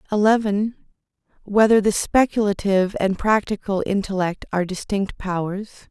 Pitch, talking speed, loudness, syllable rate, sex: 200 Hz, 100 wpm, -21 LUFS, 5.2 syllables/s, female